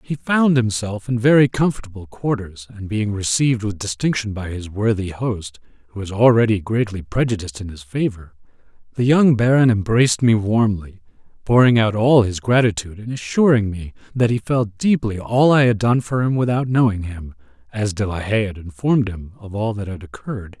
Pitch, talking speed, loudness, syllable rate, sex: 110 Hz, 185 wpm, -19 LUFS, 5.3 syllables/s, male